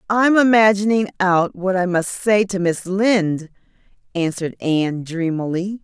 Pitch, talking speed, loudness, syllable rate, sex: 190 Hz, 135 wpm, -18 LUFS, 4.5 syllables/s, female